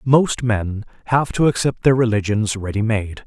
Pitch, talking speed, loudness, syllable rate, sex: 115 Hz, 165 wpm, -19 LUFS, 4.5 syllables/s, male